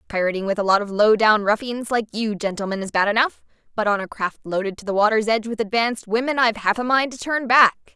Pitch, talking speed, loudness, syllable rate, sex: 220 Hz, 240 wpm, -20 LUFS, 6.4 syllables/s, female